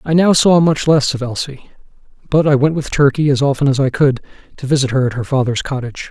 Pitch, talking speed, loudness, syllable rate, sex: 140 Hz, 235 wpm, -15 LUFS, 6.1 syllables/s, male